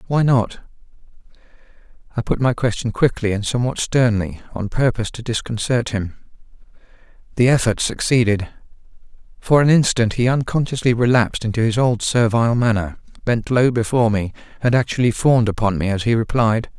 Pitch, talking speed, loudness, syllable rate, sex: 115 Hz, 145 wpm, -18 LUFS, 5.7 syllables/s, male